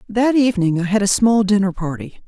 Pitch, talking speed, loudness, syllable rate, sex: 205 Hz, 210 wpm, -17 LUFS, 5.8 syllables/s, female